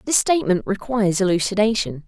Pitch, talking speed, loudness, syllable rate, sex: 205 Hz, 115 wpm, -20 LUFS, 6.2 syllables/s, female